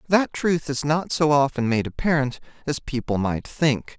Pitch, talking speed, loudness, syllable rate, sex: 140 Hz, 180 wpm, -23 LUFS, 4.5 syllables/s, male